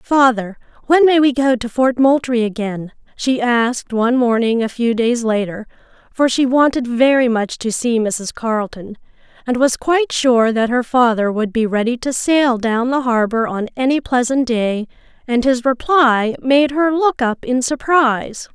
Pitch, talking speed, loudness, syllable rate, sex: 245 Hz, 175 wpm, -16 LUFS, 4.5 syllables/s, female